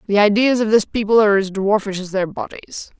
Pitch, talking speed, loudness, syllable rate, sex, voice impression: 205 Hz, 220 wpm, -17 LUFS, 5.8 syllables/s, female, very feminine, young, thin, slightly tensed, slightly weak, bright, slightly soft, clear, fluent, cute, very intellectual, refreshing, sincere, calm, friendly, reassuring, slightly unique, elegant, slightly sweet, lively, kind, slightly intense, light